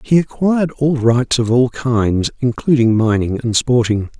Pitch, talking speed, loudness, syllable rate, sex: 125 Hz, 155 wpm, -15 LUFS, 4.4 syllables/s, male